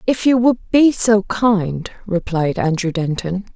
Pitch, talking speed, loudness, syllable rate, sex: 200 Hz, 150 wpm, -17 LUFS, 3.9 syllables/s, female